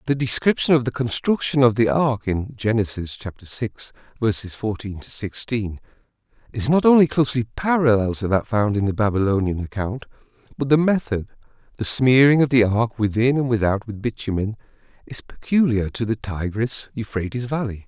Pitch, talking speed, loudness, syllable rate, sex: 115 Hz, 155 wpm, -21 LUFS, 5.2 syllables/s, male